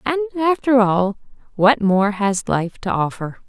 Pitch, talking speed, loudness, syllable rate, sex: 220 Hz, 155 wpm, -18 LUFS, 4.0 syllables/s, female